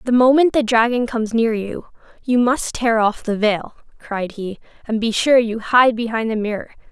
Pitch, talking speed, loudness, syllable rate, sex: 230 Hz, 200 wpm, -18 LUFS, 4.8 syllables/s, female